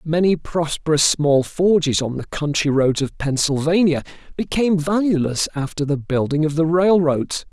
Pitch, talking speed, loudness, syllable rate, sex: 155 Hz, 145 wpm, -19 LUFS, 4.7 syllables/s, male